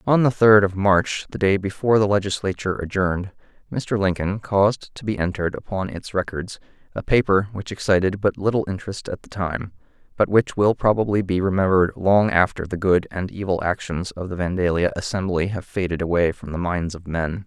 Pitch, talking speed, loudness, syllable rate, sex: 95 Hz, 190 wpm, -21 LUFS, 5.6 syllables/s, male